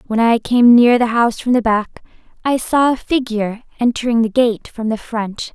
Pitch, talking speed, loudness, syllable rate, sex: 235 Hz, 205 wpm, -16 LUFS, 5.0 syllables/s, female